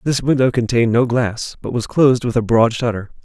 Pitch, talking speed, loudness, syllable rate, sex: 120 Hz, 220 wpm, -17 LUFS, 5.8 syllables/s, male